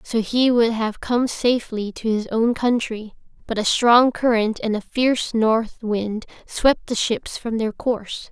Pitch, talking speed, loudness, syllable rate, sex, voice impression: 230 Hz, 180 wpm, -20 LUFS, 4.1 syllables/s, female, very feminine, young, slightly adult-like, thin, tensed, powerful, slightly bright, very hard, very clear, fluent, slightly cute, cool, intellectual, refreshing, very sincere, calm, slightly friendly, reassuring, slightly unique, elegant, slightly sweet, slightly lively, strict, sharp, slightly modest